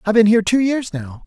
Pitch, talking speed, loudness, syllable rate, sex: 210 Hz, 285 wpm, -16 LUFS, 7.1 syllables/s, male